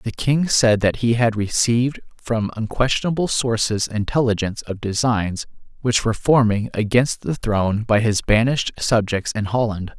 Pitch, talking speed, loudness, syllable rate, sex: 115 Hz, 150 wpm, -20 LUFS, 4.9 syllables/s, male